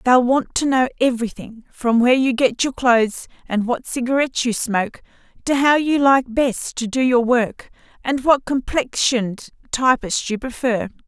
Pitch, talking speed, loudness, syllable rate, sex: 250 Hz, 170 wpm, -19 LUFS, 4.8 syllables/s, female